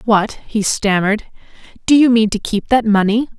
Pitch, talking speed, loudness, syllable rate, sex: 220 Hz, 175 wpm, -15 LUFS, 5.0 syllables/s, female